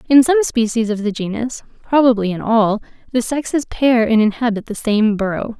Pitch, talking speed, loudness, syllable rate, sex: 230 Hz, 180 wpm, -17 LUFS, 5.3 syllables/s, female